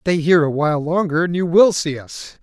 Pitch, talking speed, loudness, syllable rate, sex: 165 Hz, 245 wpm, -17 LUFS, 5.5 syllables/s, male